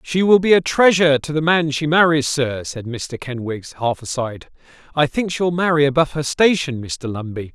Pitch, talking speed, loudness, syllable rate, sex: 145 Hz, 200 wpm, -18 LUFS, 5.2 syllables/s, male